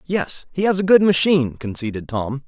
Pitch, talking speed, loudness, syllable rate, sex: 155 Hz, 195 wpm, -19 LUFS, 5.2 syllables/s, male